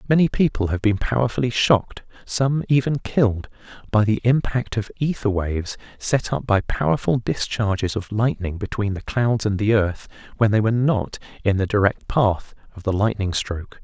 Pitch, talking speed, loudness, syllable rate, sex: 110 Hz, 160 wpm, -21 LUFS, 5.2 syllables/s, male